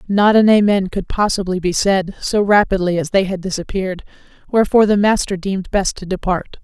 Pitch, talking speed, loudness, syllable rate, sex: 195 Hz, 180 wpm, -16 LUFS, 5.7 syllables/s, female